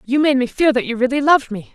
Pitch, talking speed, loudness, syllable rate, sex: 260 Hz, 310 wpm, -16 LUFS, 6.8 syllables/s, female